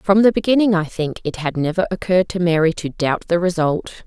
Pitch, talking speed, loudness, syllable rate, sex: 175 Hz, 220 wpm, -18 LUFS, 5.9 syllables/s, female